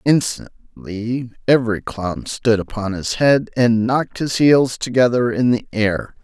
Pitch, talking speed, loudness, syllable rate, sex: 120 Hz, 145 wpm, -18 LUFS, 4.0 syllables/s, male